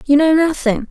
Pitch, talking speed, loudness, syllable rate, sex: 290 Hz, 200 wpm, -14 LUFS, 5.1 syllables/s, female